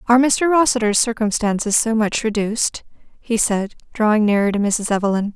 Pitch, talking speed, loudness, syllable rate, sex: 220 Hz, 155 wpm, -18 LUFS, 5.4 syllables/s, female